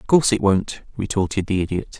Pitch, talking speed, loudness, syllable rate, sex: 100 Hz, 210 wpm, -21 LUFS, 6.0 syllables/s, male